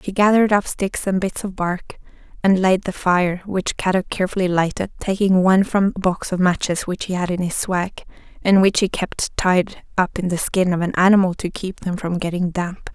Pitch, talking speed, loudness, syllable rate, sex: 185 Hz, 220 wpm, -19 LUFS, 5.1 syllables/s, female